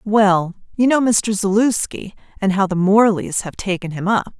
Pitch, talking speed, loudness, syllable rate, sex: 200 Hz, 180 wpm, -17 LUFS, 4.5 syllables/s, female